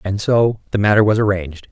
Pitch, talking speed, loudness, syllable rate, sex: 100 Hz, 210 wpm, -16 LUFS, 6.0 syllables/s, male